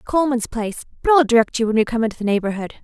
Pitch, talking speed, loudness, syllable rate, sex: 235 Hz, 255 wpm, -19 LUFS, 7.5 syllables/s, female